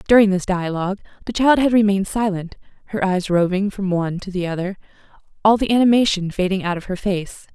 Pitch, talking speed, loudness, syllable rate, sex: 195 Hz, 190 wpm, -19 LUFS, 6.1 syllables/s, female